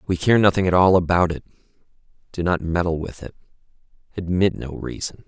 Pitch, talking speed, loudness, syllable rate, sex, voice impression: 90 Hz, 170 wpm, -20 LUFS, 5.8 syllables/s, male, very masculine, adult-like, slightly thick, cool, slightly refreshing, sincere, slightly calm